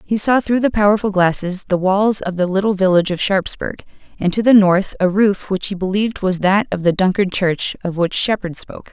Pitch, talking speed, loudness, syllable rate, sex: 195 Hz, 220 wpm, -17 LUFS, 5.4 syllables/s, female